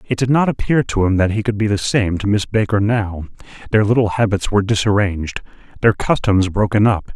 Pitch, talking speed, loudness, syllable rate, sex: 105 Hz, 210 wpm, -17 LUFS, 5.7 syllables/s, male